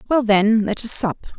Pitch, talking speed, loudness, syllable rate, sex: 225 Hz, 215 wpm, -18 LUFS, 4.4 syllables/s, female